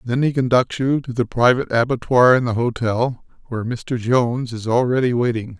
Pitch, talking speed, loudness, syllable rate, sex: 120 Hz, 180 wpm, -19 LUFS, 5.3 syllables/s, male